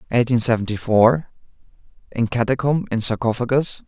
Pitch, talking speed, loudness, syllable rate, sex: 120 Hz, 95 wpm, -19 LUFS, 5.8 syllables/s, male